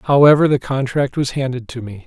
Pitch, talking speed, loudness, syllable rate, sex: 135 Hz, 205 wpm, -16 LUFS, 5.4 syllables/s, male